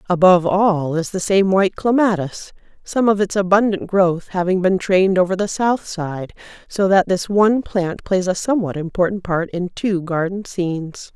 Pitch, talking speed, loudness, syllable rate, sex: 185 Hz, 180 wpm, -18 LUFS, 4.9 syllables/s, female